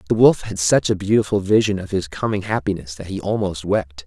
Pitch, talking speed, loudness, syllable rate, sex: 95 Hz, 220 wpm, -20 LUFS, 5.7 syllables/s, male